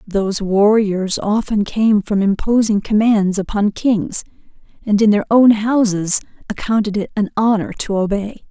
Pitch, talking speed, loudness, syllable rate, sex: 210 Hz, 140 wpm, -16 LUFS, 4.4 syllables/s, female